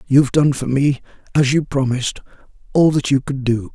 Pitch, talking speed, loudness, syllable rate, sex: 135 Hz, 210 wpm, -18 LUFS, 5.5 syllables/s, male